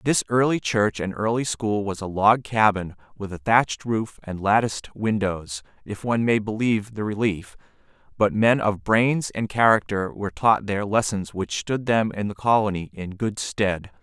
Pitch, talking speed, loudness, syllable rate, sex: 105 Hz, 180 wpm, -23 LUFS, 4.7 syllables/s, male